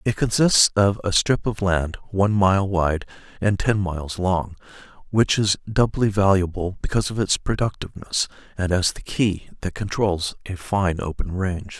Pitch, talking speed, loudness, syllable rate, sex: 95 Hz, 165 wpm, -22 LUFS, 4.7 syllables/s, male